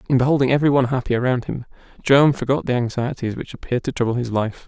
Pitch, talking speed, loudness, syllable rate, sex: 125 Hz, 220 wpm, -20 LUFS, 7.3 syllables/s, male